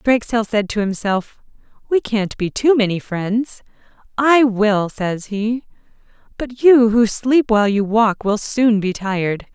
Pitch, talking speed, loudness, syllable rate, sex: 220 Hz, 155 wpm, -17 LUFS, 4.0 syllables/s, female